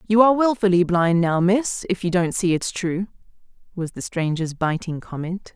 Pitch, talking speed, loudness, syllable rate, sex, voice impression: 185 Hz, 185 wpm, -21 LUFS, 5.0 syllables/s, female, very feminine, adult-like, slightly middle-aged, thin, slightly tensed, slightly weak, slightly dark, hard, slightly muffled, slightly fluent, cool, intellectual, slightly refreshing, sincere, very calm, slightly unique, elegant, slightly sweet, lively, very kind, modest, slightly light